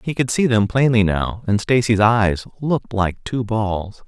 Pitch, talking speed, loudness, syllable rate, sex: 110 Hz, 190 wpm, -19 LUFS, 4.2 syllables/s, male